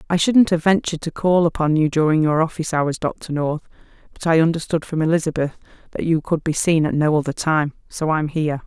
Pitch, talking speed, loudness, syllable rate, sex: 160 Hz, 215 wpm, -19 LUFS, 5.9 syllables/s, female